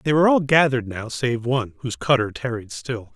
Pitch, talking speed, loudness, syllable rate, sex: 125 Hz, 210 wpm, -21 LUFS, 6.1 syllables/s, male